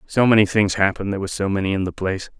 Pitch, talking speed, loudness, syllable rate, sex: 100 Hz, 250 wpm, -20 LUFS, 8.1 syllables/s, male